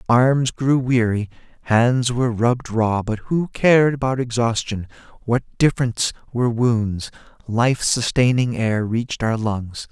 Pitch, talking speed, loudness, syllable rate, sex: 120 Hz, 135 wpm, -20 LUFS, 4.3 syllables/s, male